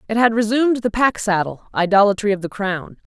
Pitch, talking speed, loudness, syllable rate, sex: 210 Hz, 195 wpm, -18 LUFS, 5.8 syllables/s, female